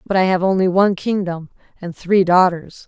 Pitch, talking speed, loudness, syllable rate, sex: 185 Hz, 190 wpm, -16 LUFS, 5.3 syllables/s, female